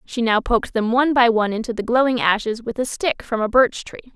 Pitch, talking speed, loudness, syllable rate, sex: 235 Hz, 260 wpm, -19 LUFS, 6.1 syllables/s, female